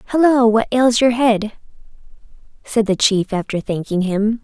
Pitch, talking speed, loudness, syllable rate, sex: 225 Hz, 150 wpm, -16 LUFS, 4.6 syllables/s, female